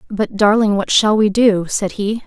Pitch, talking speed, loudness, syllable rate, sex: 210 Hz, 210 wpm, -15 LUFS, 4.5 syllables/s, female